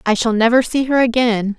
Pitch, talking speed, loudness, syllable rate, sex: 235 Hz, 230 wpm, -15 LUFS, 5.4 syllables/s, female